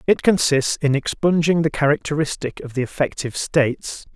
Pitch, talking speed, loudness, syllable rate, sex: 145 Hz, 145 wpm, -20 LUFS, 5.3 syllables/s, male